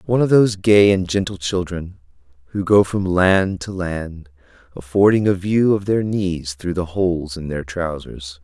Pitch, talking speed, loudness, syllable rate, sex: 90 Hz, 180 wpm, -18 LUFS, 4.5 syllables/s, male